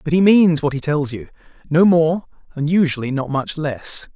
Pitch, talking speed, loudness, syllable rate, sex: 155 Hz, 200 wpm, -18 LUFS, 4.8 syllables/s, male